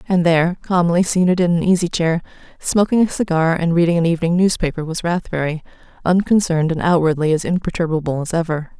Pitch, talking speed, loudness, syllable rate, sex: 170 Hz, 170 wpm, -17 LUFS, 6.1 syllables/s, female